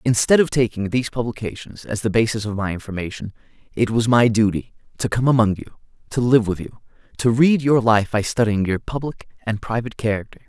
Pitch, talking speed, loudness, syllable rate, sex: 115 Hz, 195 wpm, -20 LUFS, 5.8 syllables/s, male